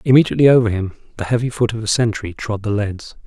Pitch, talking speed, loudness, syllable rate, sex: 110 Hz, 220 wpm, -17 LUFS, 6.6 syllables/s, male